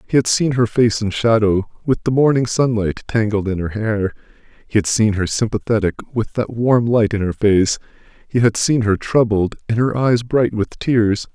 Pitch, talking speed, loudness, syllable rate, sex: 110 Hz, 200 wpm, -17 LUFS, 4.8 syllables/s, male